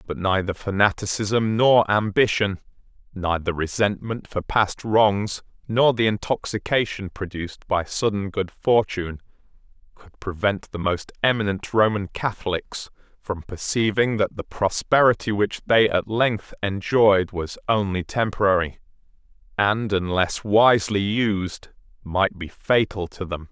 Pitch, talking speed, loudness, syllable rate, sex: 100 Hz, 120 wpm, -22 LUFS, 4.2 syllables/s, male